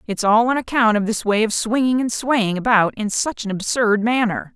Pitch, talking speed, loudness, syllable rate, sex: 225 Hz, 225 wpm, -18 LUFS, 5.0 syllables/s, female